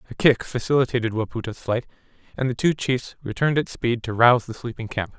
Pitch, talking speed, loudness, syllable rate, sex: 120 Hz, 195 wpm, -23 LUFS, 6.1 syllables/s, male